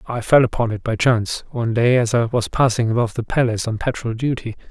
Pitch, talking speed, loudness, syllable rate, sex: 115 Hz, 230 wpm, -19 LUFS, 6.4 syllables/s, male